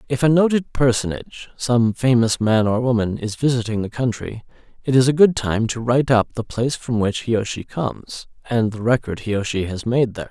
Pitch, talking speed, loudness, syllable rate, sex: 120 Hz, 220 wpm, -19 LUFS, 5.5 syllables/s, male